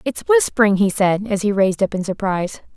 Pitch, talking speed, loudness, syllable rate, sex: 195 Hz, 215 wpm, -18 LUFS, 5.9 syllables/s, female